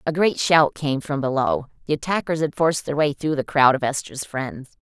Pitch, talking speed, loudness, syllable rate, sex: 145 Hz, 225 wpm, -21 LUFS, 5.2 syllables/s, female